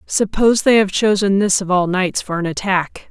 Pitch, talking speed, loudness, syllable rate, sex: 195 Hz, 215 wpm, -16 LUFS, 5.0 syllables/s, female